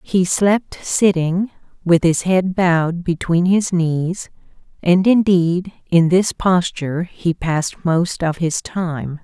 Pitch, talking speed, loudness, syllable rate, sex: 175 Hz, 135 wpm, -17 LUFS, 3.4 syllables/s, female